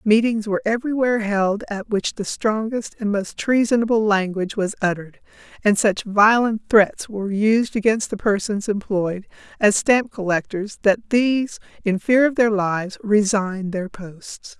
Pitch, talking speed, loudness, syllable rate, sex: 210 Hz, 150 wpm, -20 LUFS, 4.7 syllables/s, female